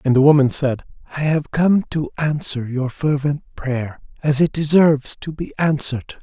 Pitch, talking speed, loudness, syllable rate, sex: 145 Hz, 175 wpm, -19 LUFS, 4.6 syllables/s, male